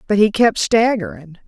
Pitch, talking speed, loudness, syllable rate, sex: 210 Hz, 165 wpm, -16 LUFS, 4.8 syllables/s, female